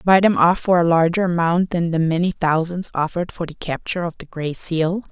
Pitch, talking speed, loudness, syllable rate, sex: 170 Hz, 225 wpm, -19 LUFS, 5.5 syllables/s, female